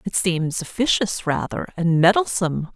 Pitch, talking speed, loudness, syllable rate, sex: 185 Hz, 130 wpm, -21 LUFS, 4.8 syllables/s, female